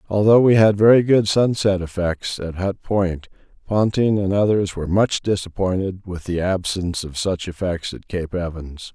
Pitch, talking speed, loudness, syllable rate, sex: 95 Hz, 170 wpm, -19 LUFS, 4.7 syllables/s, male